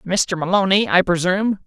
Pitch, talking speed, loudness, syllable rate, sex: 185 Hz, 145 wpm, -17 LUFS, 5.0 syllables/s, male